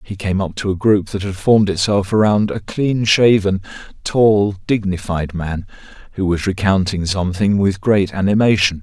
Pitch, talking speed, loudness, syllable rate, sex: 100 Hz, 165 wpm, -16 LUFS, 4.6 syllables/s, male